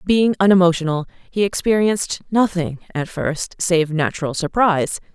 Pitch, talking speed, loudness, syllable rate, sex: 175 Hz, 115 wpm, -19 LUFS, 5.0 syllables/s, female